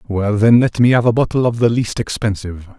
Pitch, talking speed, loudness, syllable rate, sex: 110 Hz, 235 wpm, -15 LUFS, 5.7 syllables/s, male